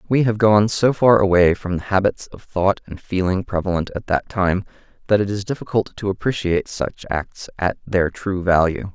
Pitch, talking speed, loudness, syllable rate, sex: 95 Hz, 195 wpm, -19 LUFS, 5.0 syllables/s, male